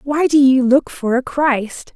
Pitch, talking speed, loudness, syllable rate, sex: 265 Hz, 215 wpm, -15 LUFS, 3.8 syllables/s, female